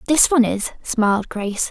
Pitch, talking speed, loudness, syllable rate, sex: 235 Hz, 175 wpm, -18 LUFS, 5.6 syllables/s, female